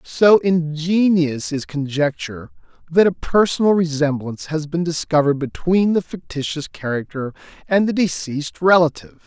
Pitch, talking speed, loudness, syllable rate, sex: 160 Hz, 125 wpm, -19 LUFS, 5.0 syllables/s, male